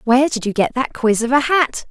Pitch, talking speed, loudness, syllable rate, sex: 250 Hz, 285 wpm, -17 LUFS, 5.6 syllables/s, female